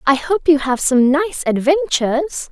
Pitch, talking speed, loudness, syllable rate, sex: 300 Hz, 165 wpm, -16 LUFS, 4.2 syllables/s, female